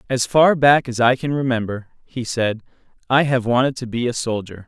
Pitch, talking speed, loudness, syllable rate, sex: 125 Hz, 205 wpm, -19 LUFS, 5.1 syllables/s, male